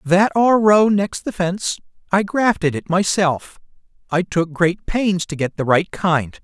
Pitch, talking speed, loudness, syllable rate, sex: 180 Hz, 175 wpm, -18 LUFS, 4.2 syllables/s, male